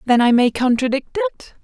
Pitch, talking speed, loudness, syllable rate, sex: 250 Hz, 185 wpm, -17 LUFS, 5.6 syllables/s, female